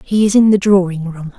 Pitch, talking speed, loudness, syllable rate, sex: 190 Hz, 260 wpm, -13 LUFS, 5.6 syllables/s, female